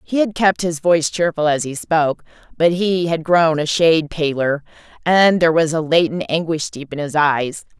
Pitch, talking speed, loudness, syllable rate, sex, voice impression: 160 Hz, 200 wpm, -17 LUFS, 4.9 syllables/s, female, feminine, adult-like, tensed, powerful, hard, nasal, intellectual, unique, slightly wild, lively, slightly intense, sharp